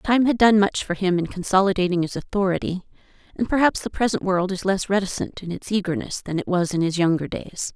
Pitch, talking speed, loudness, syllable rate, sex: 190 Hz, 215 wpm, -22 LUFS, 5.8 syllables/s, female